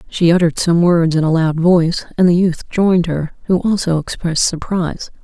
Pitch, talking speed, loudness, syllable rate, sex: 170 Hz, 195 wpm, -15 LUFS, 5.6 syllables/s, female